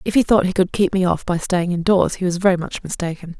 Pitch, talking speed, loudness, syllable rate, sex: 180 Hz, 285 wpm, -19 LUFS, 6.1 syllables/s, female